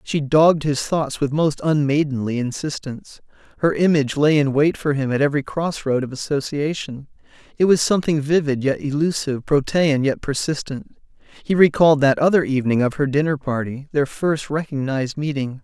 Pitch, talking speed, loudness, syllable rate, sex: 145 Hz, 160 wpm, -19 LUFS, 5.5 syllables/s, male